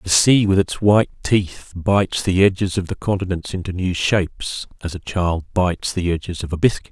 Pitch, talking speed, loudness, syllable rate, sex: 90 Hz, 210 wpm, -19 LUFS, 5.3 syllables/s, male